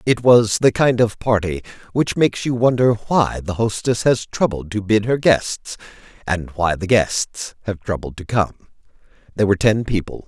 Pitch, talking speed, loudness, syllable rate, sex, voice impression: 105 Hz, 180 wpm, -18 LUFS, 4.8 syllables/s, male, masculine, middle-aged, tensed, powerful, bright, clear, very raspy, intellectual, mature, friendly, wild, lively, slightly sharp